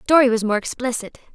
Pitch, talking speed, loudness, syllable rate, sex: 240 Hz, 180 wpm, -20 LUFS, 6.5 syllables/s, female